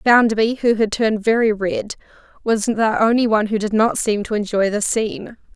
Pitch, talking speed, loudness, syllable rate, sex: 215 Hz, 195 wpm, -18 LUFS, 5.3 syllables/s, female